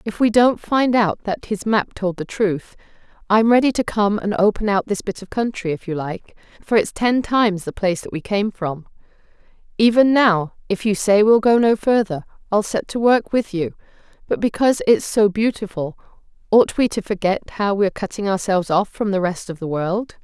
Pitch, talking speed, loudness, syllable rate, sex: 205 Hz, 210 wpm, -19 LUFS, 5.1 syllables/s, female